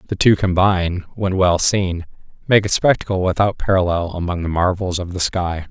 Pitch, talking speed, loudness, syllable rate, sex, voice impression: 90 Hz, 180 wpm, -18 LUFS, 5.3 syllables/s, male, very masculine, very middle-aged, very thick, tensed, very powerful, slightly bright, soft, muffled, fluent, slightly raspy, very cool, intellectual, slightly refreshing, sincere, calm, mature, very friendly, very reassuring, unique, elegant, slightly wild, sweet, lively, kind, slightly modest